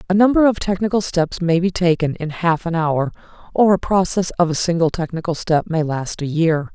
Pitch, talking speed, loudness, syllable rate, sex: 170 Hz, 215 wpm, -18 LUFS, 5.3 syllables/s, female